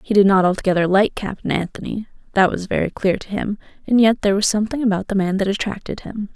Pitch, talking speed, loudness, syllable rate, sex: 200 Hz, 215 wpm, -19 LUFS, 6.5 syllables/s, female